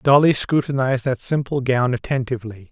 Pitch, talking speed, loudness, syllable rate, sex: 130 Hz, 135 wpm, -20 LUFS, 5.8 syllables/s, male